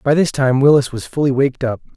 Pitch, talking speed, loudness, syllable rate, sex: 135 Hz, 245 wpm, -16 LUFS, 6.3 syllables/s, male